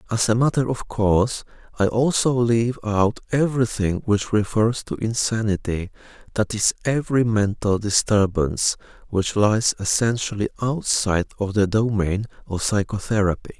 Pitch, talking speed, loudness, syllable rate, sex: 110 Hz, 125 wpm, -21 LUFS, 4.8 syllables/s, male